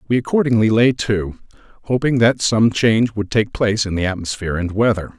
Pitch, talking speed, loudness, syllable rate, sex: 110 Hz, 185 wpm, -17 LUFS, 5.8 syllables/s, male